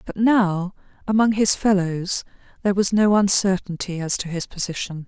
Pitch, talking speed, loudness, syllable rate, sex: 190 Hz, 155 wpm, -21 LUFS, 5.0 syllables/s, female